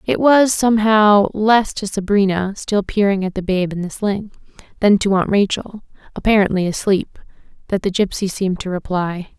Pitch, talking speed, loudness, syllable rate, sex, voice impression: 200 Hz, 165 wpm, -17 LUFS, 4.9 syllables/s, female, feminine, slightly adult-like, slightly refreshing, sincere, slightly friendly